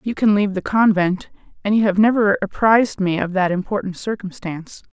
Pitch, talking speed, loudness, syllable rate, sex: 200 Hz, 180 wpm, -18 LUFS, 5.7 syllables/s, female